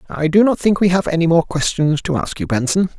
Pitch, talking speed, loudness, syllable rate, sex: 165 Hz, 260 wpm, -16 LUFS, 5.9 syllables/s, male